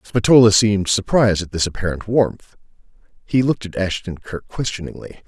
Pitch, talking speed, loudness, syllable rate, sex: 105 Hz, 150 wpm, -18 LUFS, 5.6 syllables/s, male